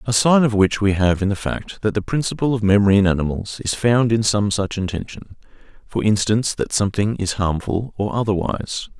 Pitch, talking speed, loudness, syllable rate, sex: 105 Hz, 200 wpm, -19 LUFS, 5.6 syllables/s, male